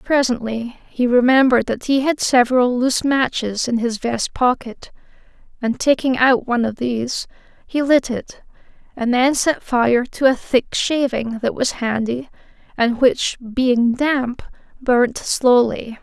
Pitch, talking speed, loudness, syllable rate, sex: 250 Hz, 145 wpm, -18 LUFS, 4.1 syllables/s, female